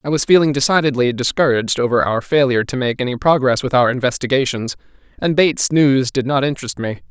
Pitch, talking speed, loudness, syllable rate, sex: 130 Hz, 185 wpm, -16 LUFS, 6.3 syllables/s, male